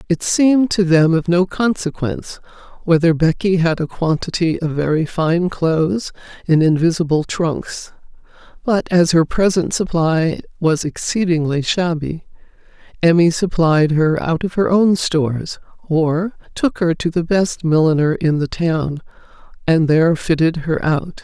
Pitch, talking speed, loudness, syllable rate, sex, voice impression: 165 Hz, 140 wpm, -17 LUFS, 4.3 syllables/s, female, slightly masculine, slightly feminine, very gender-neutral, adult-like, slightly middle-aged, slightly thick, slightly tensed, weak, dark, slightly soft, muffled, slightly halting, slightly raspy, intellectual, very sincere, very calm, slightly friendly, reassuring, very unique, very elegant, slightly sweet, very kind, very modest